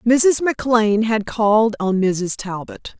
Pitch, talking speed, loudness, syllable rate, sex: 220 Hz, 140 wpm, -18 LUFS, 4.3 syllables/s, female